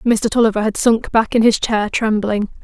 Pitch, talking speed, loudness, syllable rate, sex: 220 Hz, 205 wpm, -16 LUFS, 4.8 syllables/s, female